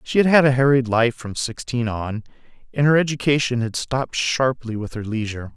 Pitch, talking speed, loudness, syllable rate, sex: 125 Hz, 195 wpm, -20 LUFS, 5.4 syllables/s, male